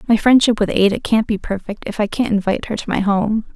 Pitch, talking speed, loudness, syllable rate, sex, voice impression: 210 Hz, 255 wpm, -17 LUFS, 6.1 syllables/s, female, very feminine, very adult-like, very thin, slightly tensed, weak, dark, slightly soft, muffled, fluent, very raspy, cute, very intellectual, slightly refreshing, sincere, very calm, very friendly, reassuring, very unique, elegant, wild, very sweet, lively, very kind, very modest, slightly light